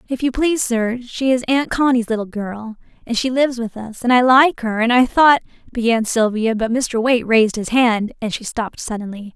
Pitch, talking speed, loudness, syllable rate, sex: 235 Hz, 220 wpm, -17 LUFS, 5.4 syllables/s, female